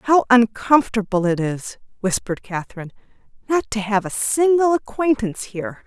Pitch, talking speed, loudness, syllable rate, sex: 225 Hz, 135 wpm, -20 LUFS, 5.4 syllables/s, female